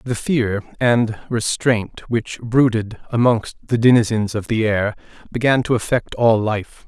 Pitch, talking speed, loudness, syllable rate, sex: 115 Hz, 150 wpm, -19 LUFS, 4.0 syllables/s, male